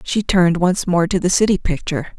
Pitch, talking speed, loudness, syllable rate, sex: 180 Hz, 220 wpm, -17 LUFS, 6.0 syllables/s, female